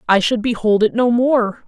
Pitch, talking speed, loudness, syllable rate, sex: 230 Hz, 215 wpm, -16 LUFS, 4.6 syllables/s, female